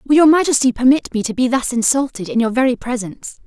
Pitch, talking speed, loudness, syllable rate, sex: 250 Hz, 225 wpm, -16 LUFS, 6.3 syllables/s, female